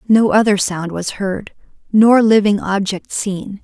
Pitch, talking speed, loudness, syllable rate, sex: 205 Hz, 150 wpm, -15 LUFS, 3.9 syllables/s, female